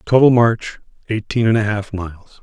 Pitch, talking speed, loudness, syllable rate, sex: 110 Hz, 175 wpm, -17 LUFS, 5.0 syllables/s, male